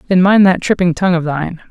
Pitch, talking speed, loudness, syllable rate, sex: 180 Hz, 245 wpm, -13 LUFS, 7.0 syllables/s, female